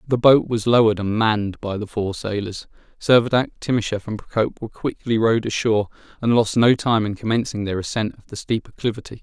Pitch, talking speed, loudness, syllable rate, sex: 110 Hz, 195 wpm, -20 LUFS, 6.1 syllables/s, male